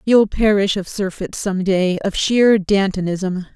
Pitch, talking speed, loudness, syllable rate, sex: 195 Hz, 150 wpm, -18 LUFS, 3.9 syllables/s, female